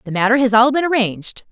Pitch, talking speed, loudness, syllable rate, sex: 240 Hz, 240 wpm, -15 LUFS, 6.6 syllables/s, female